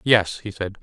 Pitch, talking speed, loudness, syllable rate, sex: 105 Hz, 220 wpm, -22 LUFS, 4.6 syllables/s, male